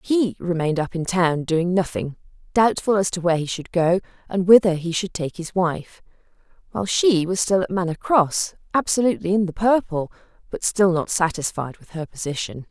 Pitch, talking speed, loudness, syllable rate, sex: 180 Hz, 185 wpm, -21 LUFS, 5.3 syllables/s, female